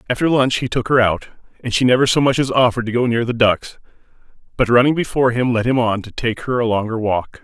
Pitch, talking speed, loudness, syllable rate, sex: 120 Hz, 250 wpm, -17 LUFS, 6.3 syllables/s, male